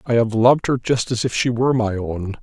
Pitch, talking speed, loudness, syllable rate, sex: 115 Hz, 275 wpm, -19 LUFS, 5.7 syllables/s, male